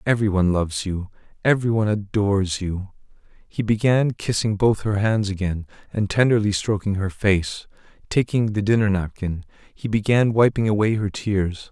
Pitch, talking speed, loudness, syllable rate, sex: 105 Hz, 155 wpm, -21 LUFS, 5.1 syllables/s, male